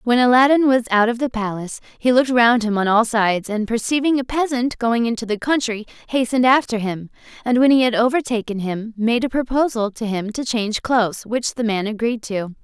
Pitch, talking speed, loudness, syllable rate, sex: 235 Hz, 210 wpm, -19 LUFS, 5.6 syllables/s, female